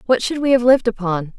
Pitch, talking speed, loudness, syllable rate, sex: 230 Hz, 260 wpm, -17 LUFS, 6.7 syllables/s, female